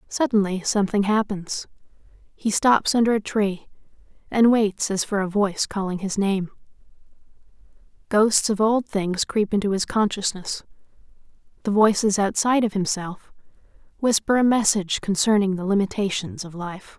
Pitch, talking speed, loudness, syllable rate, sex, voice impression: 205 Hz, 135 wpm, -22 LUFS, 5.0 syllables/s, female, feminine, slightly adult-like, slightly cute, sincere, slightly calm